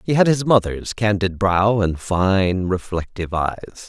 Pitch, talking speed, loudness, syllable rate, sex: 100 Hz, 155 wpm, -19 LUFS, 4.3 syllables/s, male